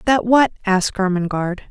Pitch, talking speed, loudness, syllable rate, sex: 205 Hz, 140 wpm, -18 LUFS, 5.8 syllables/s, female